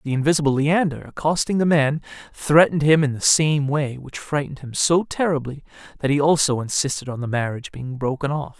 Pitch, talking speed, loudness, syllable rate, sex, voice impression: 145 Hz, 195 wpm, -20 LUFS, 5.9 syllables/s, male, masculine, adult-like, tensed, powerful, bright, slightly muffled, cool, calm, friendly, slightly reassuring, slightly wild, lively, kind, slightly modest